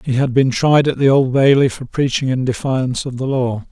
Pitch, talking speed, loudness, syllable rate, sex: 130 Hz, 240 wpm, -16 LUFS, 5.3 syllables/s, male